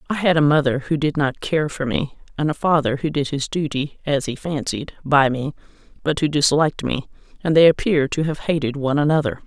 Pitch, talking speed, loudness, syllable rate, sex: 145 Hz, 215 wpm, -20 LUFS, 5.6 syllables/s, female